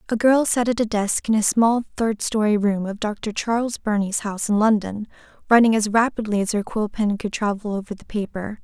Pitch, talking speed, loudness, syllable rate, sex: 215 Hz, 215 wpm, -21 LUFS, 5.3 syllables/s, female